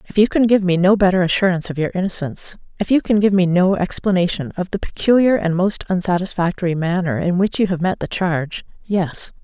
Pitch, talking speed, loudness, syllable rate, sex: 185 Hz, 195 wpm, -18 LUFS, 6.0 syllables/s, female